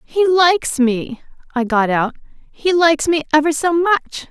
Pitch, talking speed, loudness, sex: 300 Hz, 165 wpm, -16 LUFS, female